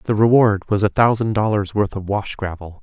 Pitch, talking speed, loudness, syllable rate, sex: 105 Hz, 215 wpm, -18 LUFS, 5.0 syllables/s, male